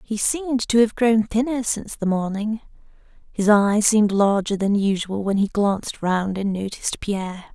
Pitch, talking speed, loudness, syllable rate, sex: 210 Hz, 175 wpm, -21 LUFS, 4.9 syllables/s, female